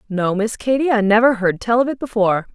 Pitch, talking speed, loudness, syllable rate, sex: 220 Hz, 235 wpm, -17 LUFS, 6.0 syllables/s, female